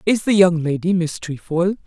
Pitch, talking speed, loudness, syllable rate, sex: 175 Hz, 195 wpm, -18 LUFS, 4.8 syllables/s, female